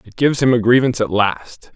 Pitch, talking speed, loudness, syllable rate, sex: 115 Hz, 240 wpm, -16 LUFS, 6.1 syllables/s, male